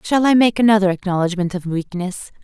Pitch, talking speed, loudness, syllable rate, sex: 195 Hz, 175 wpm, -17 LUFS, 5.8 syllables/s, female